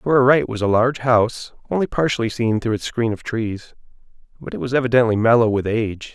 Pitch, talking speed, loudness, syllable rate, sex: 115 Hz, 215 wpm, -19 LUFS, 6.0 syllables/s, male